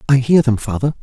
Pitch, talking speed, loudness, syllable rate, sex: 130 Hz, 235 wpm, -15 LUFS, 6.2 syllables/s, male